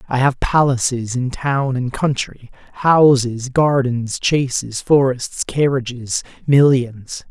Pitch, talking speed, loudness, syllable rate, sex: 130 Hz, 105 wpm, -17 LUFS, 3.5 syllables/s, male